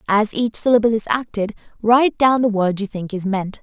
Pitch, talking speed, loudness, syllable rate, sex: 215 Hz, 215 wpm, -18 LUFS, 5.4 syllables/s, female